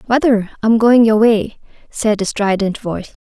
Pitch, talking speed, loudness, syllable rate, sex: 220 Hz, 170 wpm, -14 LUFS, 4.7 syllables/s, female